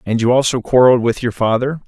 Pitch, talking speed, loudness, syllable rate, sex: 120 Hz, 225 wpm, -15 LUFS, 6.4 syllables/s, male